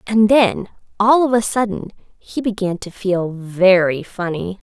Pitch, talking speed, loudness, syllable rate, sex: 200 Hz, 155 wpm, -17 LUFS, 3.9 syllables/s, female